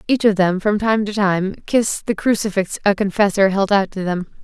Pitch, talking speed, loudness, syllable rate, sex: 200 Hz, 215 wpm, -18 LUFS, 5.2 syllables/s, female